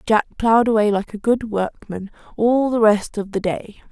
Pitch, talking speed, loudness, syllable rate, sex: 215 Hz, 200 wpm, -19 LUFS, 4.8 syllables/s, female